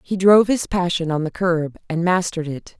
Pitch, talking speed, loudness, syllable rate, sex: 175 Hz, 215 wpm, -19 LUFS, 5.4 syllables/s, female